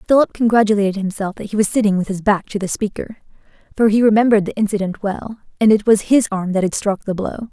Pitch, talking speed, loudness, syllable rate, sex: 205 Hz, 230 wpm, -17 LUFS, 6.4 syllables/s, female